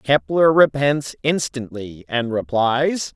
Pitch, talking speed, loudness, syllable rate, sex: 135 Hz, 95 wpm, -19 LUFS, 3.3 syllables/s, male